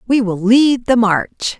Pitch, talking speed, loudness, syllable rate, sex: 230 Hz, 190 wpm, -14 LUFS, 3.5 syllables/s, female